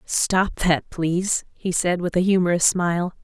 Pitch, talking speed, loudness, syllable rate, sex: 180 Hz, 165 wpm, -21 LUFS, 4.4 syllables/s, female